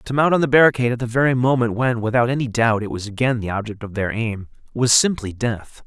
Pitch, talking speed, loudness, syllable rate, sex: 120 Hz, 245 wpm, -19 LUFS, 6.2 syllables/s, male